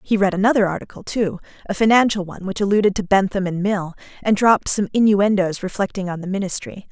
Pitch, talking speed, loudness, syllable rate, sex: 195 Hz, 190 wpm, -19 LUFS, 6.3 syllables/s, female